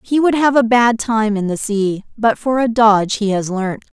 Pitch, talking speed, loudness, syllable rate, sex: 220 Hz, 240 wpm, -16 LUFS, 4.6 syllables/s, female